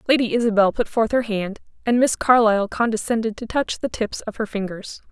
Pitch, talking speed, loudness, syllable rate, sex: 225 Hz, 200 wpm, -21 LUFS, 5.6 syllables/s, female